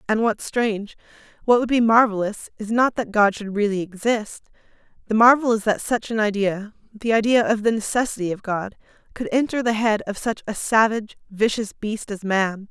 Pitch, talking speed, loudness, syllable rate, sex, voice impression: 215 Hz, 190 wpm, -21 LUFS, 5.2 syllables/s, female, feminine, adult-like, slightly powerful, slightly clear, friendly, slightly reassuring